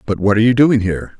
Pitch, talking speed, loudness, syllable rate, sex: 110 Hz, 300 wpm, -14 LUFS, 7.8 syllables/s, male